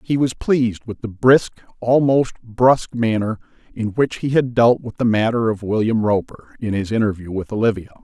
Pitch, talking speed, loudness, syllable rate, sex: 115 Hz, 185 wpm, -19 LUFS, 5.2 syllables/s, male